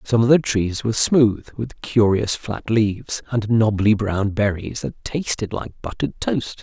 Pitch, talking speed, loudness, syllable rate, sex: 110 Hz, 170 wpm, -20 LUFS, 4.2 syllables/s, male